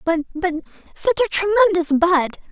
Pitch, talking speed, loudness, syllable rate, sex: 350 Hz, 95 wpm, -18 LUFS, 5.9 syllables/s, female